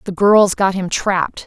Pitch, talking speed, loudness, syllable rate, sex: 190 Hz, 205 wpm, -15 LUFS, 4.5 syllables/s, female